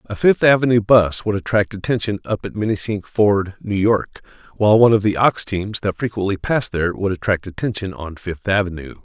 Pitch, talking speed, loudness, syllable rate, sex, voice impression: 100 Hz, 190 wpm, -18 LUFS, 5.4 syllables/s, male, very masculine, very adult-like, very middle-aged, slightly tensed, slightly powerful, slightly dark, hard, slightly clear, fluent, cool, intellectual, slightly refreshing, calm, mature, friendly, reassuring, slightly unique, slightly elegant, wild, slightly sweet, slightly lively, kind